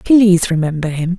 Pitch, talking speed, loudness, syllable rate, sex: 180 Hz, 150 wpm, -14 LUFS, 5.2 syllables/s, female